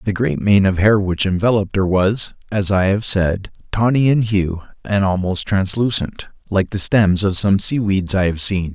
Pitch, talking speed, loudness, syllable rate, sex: 100 Hz, 190 wpm, -17 LUFS, 4.6 syllables/s, male